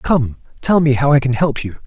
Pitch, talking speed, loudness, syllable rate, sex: 135 Hz, 255 wpm, -16 LUFS, 5.2 syllables/s, male